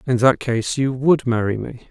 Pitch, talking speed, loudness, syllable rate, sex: 125 Hz, 190 wpm, -19 LUFS, 4.9 syllables/s, male